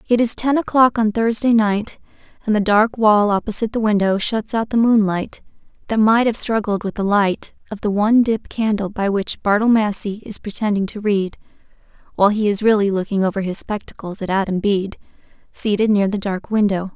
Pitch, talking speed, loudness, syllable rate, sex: 210 Hz, 190 wpm, -18 LUFS, 5.4 syllables/s, female